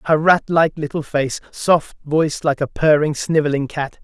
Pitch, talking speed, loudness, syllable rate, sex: 150 Hz, 165 wpm, -18 LUFS, 5.0 syllables/s, male